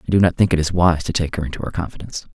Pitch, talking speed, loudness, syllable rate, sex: 85 Hz, 330 wpm, -19 LUFS, 7.7 syllables/s, male